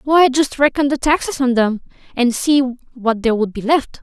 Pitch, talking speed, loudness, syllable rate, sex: 260 Hz, 210 wpm, -17 LUFS, 5.0 syllables/s, female